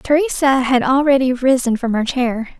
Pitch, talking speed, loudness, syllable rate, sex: 260 Hz, 160 wpm, -16 LUFS, 5.3 syllables/s, female